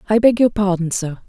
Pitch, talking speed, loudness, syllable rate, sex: 200 Hz, 235 wpm, -17 LUFS, 5.7 syllables/s, female